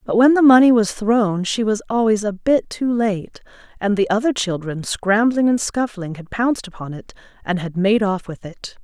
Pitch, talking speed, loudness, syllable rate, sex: 215 Hz, 205 wpm, -18 LUFS, 4.8 syllables/s, female